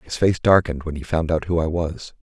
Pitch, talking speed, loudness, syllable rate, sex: 85 Hz, 265 wpm, -21 LUFS, 5.9 syllables/s, male